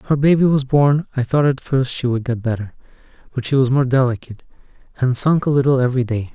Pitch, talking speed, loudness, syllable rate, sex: 130 Hz, 225 wpm, -17 LUFS, 6.5 syllables/s, male